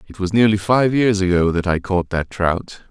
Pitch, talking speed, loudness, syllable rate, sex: 95 Hz, 225 wpm, -18 LUFS, 4.8 syllables/s, male